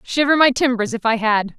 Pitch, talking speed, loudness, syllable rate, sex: 245 Hz, 230 wpm, -17 LUFS, 5.4 syllables/s, female